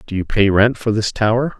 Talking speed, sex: 265 wpm, male